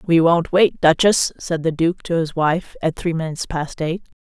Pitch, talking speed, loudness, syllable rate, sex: 165 Hz, 210 wpm, -19 LUFS, 4.7 syllables/s, female